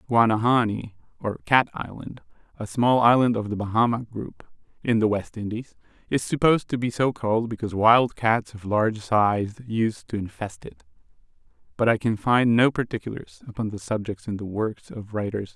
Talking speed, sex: 190 wpm, male